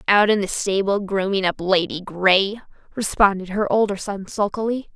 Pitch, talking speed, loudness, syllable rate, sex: 195 Hz, 155 wpm, -20 LUFS, 4.9 syllables/s, female